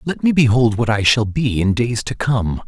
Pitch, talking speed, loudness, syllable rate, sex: 115 Hz, 245 wpm, -17 LUFS, 4.7 syllables/s, male